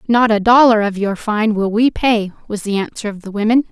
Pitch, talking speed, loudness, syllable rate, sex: 215 Hz, 240 wpm, -15 LUFS, 5.4 syllables/s, female